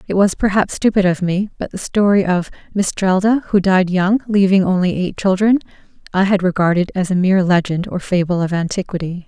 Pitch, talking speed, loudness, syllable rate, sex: 190 Hz, 190 wpm, -16 LUFS, 5.5 syllables/s, female